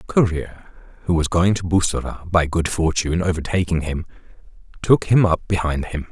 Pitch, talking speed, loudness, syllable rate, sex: 85 Hz, 165 wpm, -20 LUFS, 5.4 syllables/s, male